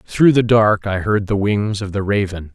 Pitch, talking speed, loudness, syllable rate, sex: 105 Hz, 235 wpm, -17 LUFS, 4.5 syllables/s, male